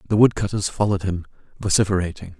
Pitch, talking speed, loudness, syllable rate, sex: 95 Hz, 125 wpm, -21 LUFS, 7.1 syllables/s, male